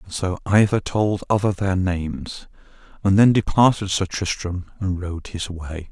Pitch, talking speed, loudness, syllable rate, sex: 95 Hz, 160 wpm, -21 LUFS, 4.3 syllables/s, male